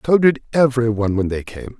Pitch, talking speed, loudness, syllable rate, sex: 120 Hz, 235 wpm, -18 LUFS, 6.3 syllables/s, male